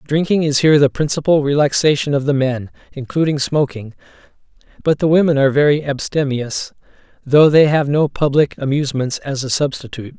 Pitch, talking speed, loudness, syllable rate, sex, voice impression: 140 Hz, 155 wpm, -16 LUFS, 5.7 syllables/s, male, masculine, adult-like, tensed, powerful, slightly bright, clear, fluent, cool, intellectual, sincere, calm, friendly, wild, lively, kind